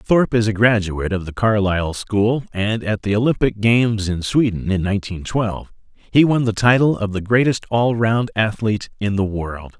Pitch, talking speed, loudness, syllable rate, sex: 105 Hz, 190 wpm, -18 LUFS, 5.2 syllables/s, male